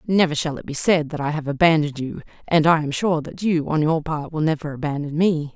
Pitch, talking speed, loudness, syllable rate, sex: 155 Hz, 250 wpm, -21 LUFS, 5.8 syllables/s, female